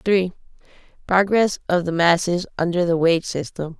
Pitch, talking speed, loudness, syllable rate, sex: 175 Hz, 140 wpm, -20 LUFS, 4.6 syllables/s, female